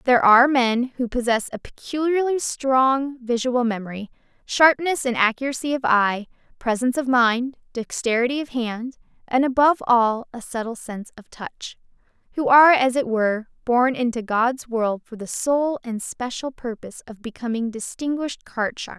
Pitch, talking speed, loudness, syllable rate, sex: 245 Hz, 155 wpm, -21 LUFS, 5.0 syllables/s, female